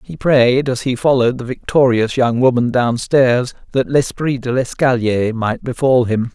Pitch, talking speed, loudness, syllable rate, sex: 125 Hz, 160 wpm, -16 LUFS, 4.5 syllables/s, male